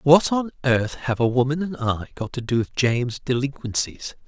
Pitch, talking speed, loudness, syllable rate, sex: 130 Hz, 195 wpm, -23 LUFS, 4.9 syllables/s, male